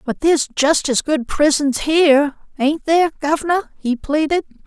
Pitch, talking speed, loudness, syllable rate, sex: 300 Hz, 155 wpm, -17 LUFS, 4.7 syllables/s, female